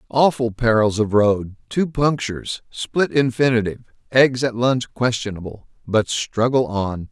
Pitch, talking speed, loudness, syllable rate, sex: 120 Hz, 125 wpm, -20 LUFS, 4.4 syllables/s, male